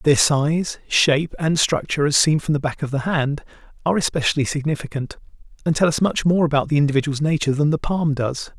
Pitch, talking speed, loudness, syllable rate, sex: 150 Hz, 205 wpm, -20 LUFS, 6.0 syllables/s, male